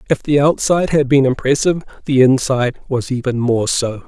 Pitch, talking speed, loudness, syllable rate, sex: 135 Hz, 175 wpm, -16 LUFS, 5.6 syllables/s, male